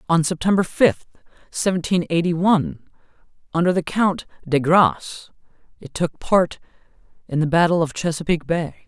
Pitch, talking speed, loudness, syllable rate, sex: 165 Hz, 135 wpm, -20 LUFS, 5.1 syllables/s, male